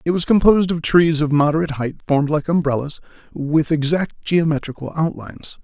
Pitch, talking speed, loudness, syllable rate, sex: 155 Hz, 160 wpm, -18 LUFS, 5.7 syllables/s, male